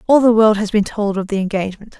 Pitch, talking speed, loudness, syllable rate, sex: 210 Hz, 270 wpm, -16 LUFS, 6.6 syllables/s, female